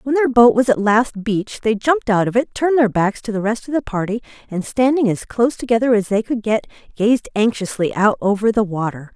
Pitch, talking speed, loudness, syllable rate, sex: 225 Hz, 235 wpm, -18 LUFS, 5.7 syllables/s, female